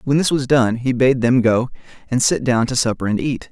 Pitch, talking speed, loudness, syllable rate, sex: 125 Hz, 255 wpm, -17 LUFS, 5.3 syllables/s, male